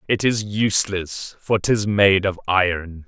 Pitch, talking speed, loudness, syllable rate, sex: 100 Hz, 155 wpm, -19 LUFS, 4.0 syllables/s, male